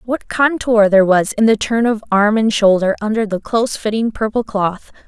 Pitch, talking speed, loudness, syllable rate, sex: 215 Hz, 200 wpm, -15 LUFS, 5.2 syllables/s, female